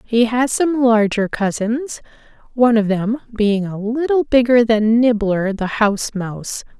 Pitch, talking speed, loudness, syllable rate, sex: 225 Hz, 150 wpm, -17 LUFS, 4.2 syllables/s, female